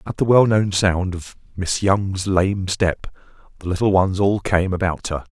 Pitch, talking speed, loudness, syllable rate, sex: 95 Hz, 180 wpm, -19 LUFS, 4.2 syllables/s, male